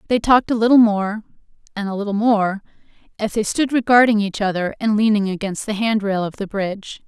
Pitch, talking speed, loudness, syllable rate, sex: 210 Hz, 205 wpm, -18 LUFS, 5.8 syllables/s, female